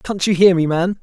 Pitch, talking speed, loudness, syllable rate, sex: 180 Hz, 295 wpm, -15 LUFS, 5.4 syllables/s, male